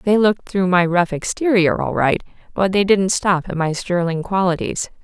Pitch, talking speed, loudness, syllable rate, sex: 185 Hz, 190 wpm, -18 LUFS, 4.8 syllables/s, female